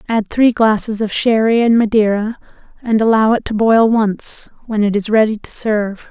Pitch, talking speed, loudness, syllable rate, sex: 220 Hz, 185 wpm, -15 LUFS, 4.8 syllables/s, female